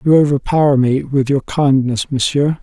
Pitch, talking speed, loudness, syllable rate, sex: 140 Hz, 160 wpm, -15 LUFS, 4.7 syllables/s, male